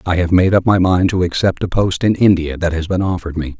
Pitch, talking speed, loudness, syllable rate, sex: 90 Hz, 285 wpm, -15 LUFS, 6.1 syllables/s, male